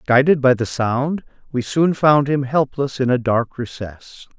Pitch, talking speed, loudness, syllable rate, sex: 130 Hz, 180 wpm, -18 LUFS, 4.1 syllables/s, male